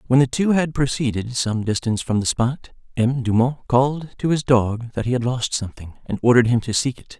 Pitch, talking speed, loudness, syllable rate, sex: 125 Hz, 225 wpm, -20 LUFS, 5.8 syllables/s, male